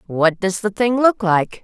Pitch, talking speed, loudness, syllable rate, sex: 200 Hz, 220 wpm, -17 LUFS, 4.1 syllables/s, female